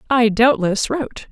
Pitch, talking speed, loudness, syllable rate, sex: 235 Hz, 135 wpm, -17 LUFS, 4.6 syllables/s, female